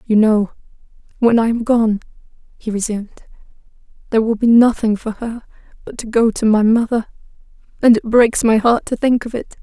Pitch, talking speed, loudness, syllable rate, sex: 225 Hz, 180 wpm, -16 LUFS, 5.3 syllables/s, female